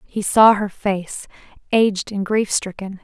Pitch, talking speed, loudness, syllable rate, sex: 200 Hz, 160 wpm, -18 LUFS, 4.0 syllables/s, female